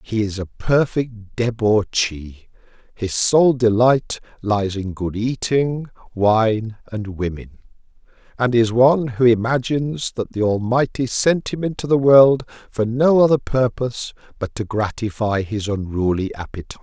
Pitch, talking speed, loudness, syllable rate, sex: 115 Hz, 135 wpm, -19 LUFS, 4.2 syllables/s, male